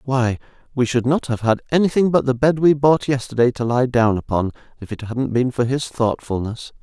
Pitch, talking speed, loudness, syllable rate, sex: 125 Hz, 210 wpm, -19 LUFS, 5.3 syllables/s, male